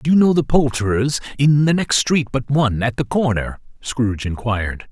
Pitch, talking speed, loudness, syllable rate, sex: 130 Hz, 195 wpm, -18 LUFS, 5.2 syllables/s, male